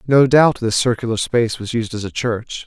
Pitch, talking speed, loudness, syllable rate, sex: 115 Hz, 225 wpm, -17 LUFS, 5.2 syllables/s, male